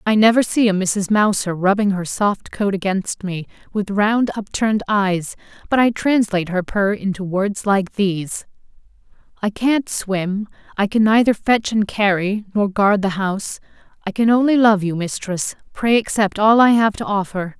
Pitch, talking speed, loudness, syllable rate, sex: 205 Hz, 170 wpm, -18 LUFS, 4.6 syllables/s, female